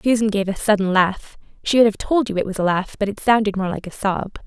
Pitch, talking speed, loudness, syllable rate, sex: 205 Hz, 255 wpm, -19 LUFS, 5.8 syllables/s, female